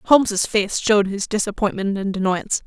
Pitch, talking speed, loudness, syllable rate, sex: 205 Hz, 160 wpm, -20 LUFS, 5.4 syllables/s, female